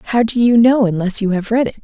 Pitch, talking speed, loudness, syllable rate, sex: 220 Hz, 295 wpm, -14 LUFS, 6.6 syllables/s, female